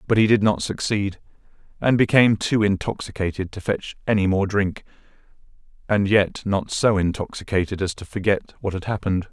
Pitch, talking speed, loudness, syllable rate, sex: 100 Hz, 160 wpm, -22 LUFS, 5.5 syllables/s, male